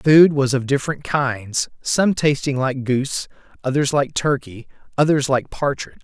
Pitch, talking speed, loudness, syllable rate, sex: 140 Hz, 150 wpm, -19 LUFS, 4.9 syllables/s, male